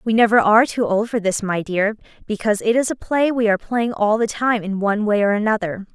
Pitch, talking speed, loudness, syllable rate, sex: 215 Hz, 250 wpm, -19 LUFS, 6.0 syllables/s, female